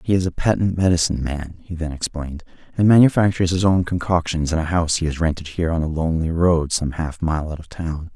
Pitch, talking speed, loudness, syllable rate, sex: 85 Hz, 230 wpm, -20 LUFS, 6.3 syllables/s, male